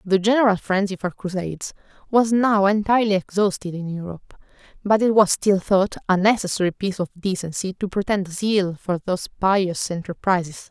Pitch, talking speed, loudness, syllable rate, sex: 195 Hz, 155 wpm, -21 LUFS, 5.4 syllables/s, female